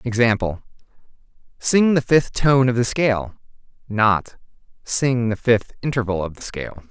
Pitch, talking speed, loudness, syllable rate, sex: 115 Hz, 140 wpm, -20 LUFS, 4.5 syllables/s, male